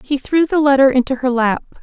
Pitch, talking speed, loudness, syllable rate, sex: 265 Hz, 230 wpm, -15 LUFS, 5.8 syllables/s, female